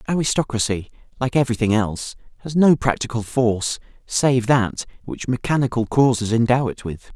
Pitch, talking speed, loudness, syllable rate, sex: 120 Hz, 135 wpm, -20 LUFS, 5.4 syllables/s, male